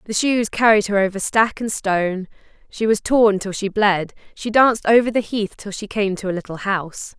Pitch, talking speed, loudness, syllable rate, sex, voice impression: 205 Hz, 215 wpm, -19 LUFS, 5.2 syllables/s, female, feminine, adult-like, slightly powerful, intellectual, slightly sharp